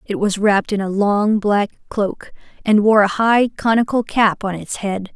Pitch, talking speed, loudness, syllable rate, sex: 210 Hz, 200 wpm, -17 LUFS, 4.5 syllables/s, female